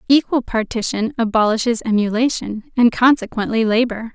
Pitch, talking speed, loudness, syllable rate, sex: 230 Hz, 100 wpm, -18 LUFS, 5.2 syllables/s, female